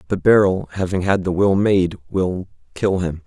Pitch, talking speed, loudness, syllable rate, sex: 95 Hz, 165 wpm, -18 LUFS, 4.6 syllables/s, male